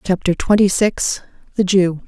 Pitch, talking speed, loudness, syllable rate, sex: 190 Hz, 145 wpm, -16 LUFS, 4.4 syllables/s, female